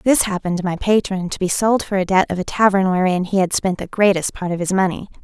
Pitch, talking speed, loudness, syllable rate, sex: 190 Hz, 275 wpm, -18 LUFS, 6.1 syllables/s, female